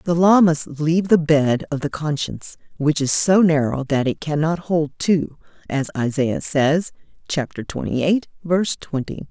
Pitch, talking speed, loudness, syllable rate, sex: 155 Hz, 170 wpm, -19 LUFS, 4.5 syllables/s, female